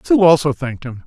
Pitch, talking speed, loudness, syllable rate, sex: 150 Hz, 225 wpm, -15 LUFS, 6.3 syllables/s, male